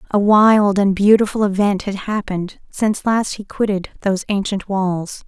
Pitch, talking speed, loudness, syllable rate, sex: 200 Hz, 160 wpm, -17 LUFS, 4.8 syllables/s, female